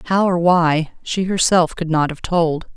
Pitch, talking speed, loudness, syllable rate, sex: 170 Hz, 195 wpm, -17 LUFS, 4.2 syllables/s, female